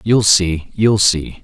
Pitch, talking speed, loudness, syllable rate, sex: 100 Hz, 170 wpm, -14 LUFS, 3.1 syllables/s, male